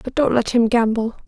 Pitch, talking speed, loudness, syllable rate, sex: 235 Hz, 235 wpm, -18 LUFS, 5.7 syllables/s, female